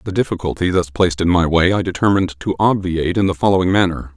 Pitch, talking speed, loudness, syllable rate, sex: 90 Hz, 215 wpm, -17 LUFS, 6.8 syllables/s, male